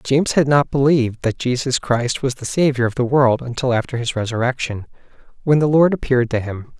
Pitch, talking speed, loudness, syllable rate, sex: 130 Hz, 205 wpm, -18 LUFS, 5.7 syllables/s, male